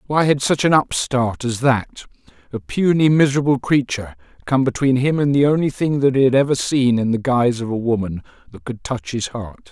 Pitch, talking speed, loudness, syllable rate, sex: 130 Hz, 210 wpm, -18 LUFS, 5.5 syllables/s, male